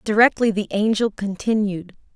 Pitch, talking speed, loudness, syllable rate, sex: 210 Hz, 110 wpm, -20 LUFS, 5.0 syllables/s, female